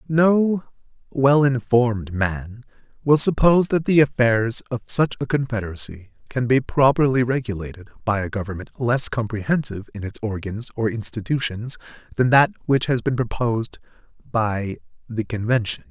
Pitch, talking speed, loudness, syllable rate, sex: 120 Hz, 135 wpm, -21 LUFS, 4.8 syllables/s, male